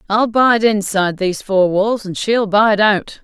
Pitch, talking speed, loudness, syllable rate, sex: 205 Hz, 185 wpm, -15 LUFS, 4.3 syllables/s, female